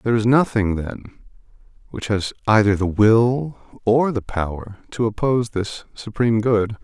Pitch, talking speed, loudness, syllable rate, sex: 110 Hz, 150 wpm, -19 LUFS, 4.8 syllables/s, male